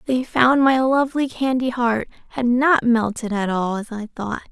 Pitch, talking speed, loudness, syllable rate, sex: 240 Hz, 185 wpm, -19 LUFS, 4.6 syllables/s, female